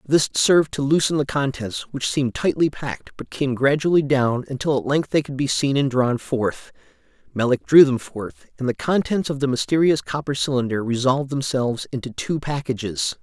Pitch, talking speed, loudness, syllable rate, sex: 135 Hz, 185 wpm, -21 LUFS, 5.2 syllables/s, male